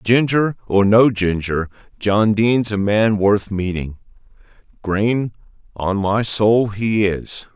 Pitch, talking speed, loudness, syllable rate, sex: 105 Hz, 125 wpm, -17 LUFS, 3.6 syllables/s, male